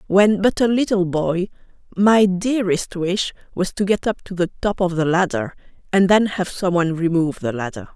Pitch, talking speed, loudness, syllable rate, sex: 185 Hz, 190 wpm, -19 LUFS, 5.1 syllables/s, female